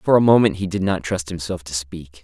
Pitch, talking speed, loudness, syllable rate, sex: 90 Hz, 270 wpm, -20 LUFS, 5.5 syllables/s, male